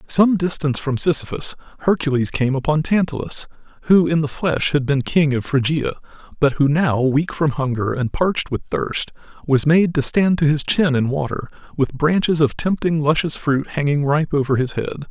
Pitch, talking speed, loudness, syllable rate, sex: 150 Hz, 185 wpm, -19 LUFS, 5.0 syllables/s, male